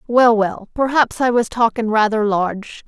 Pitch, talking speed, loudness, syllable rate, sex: 225 Hz, 165 wpm, -17 LUFS, 4.5 syllables/s, female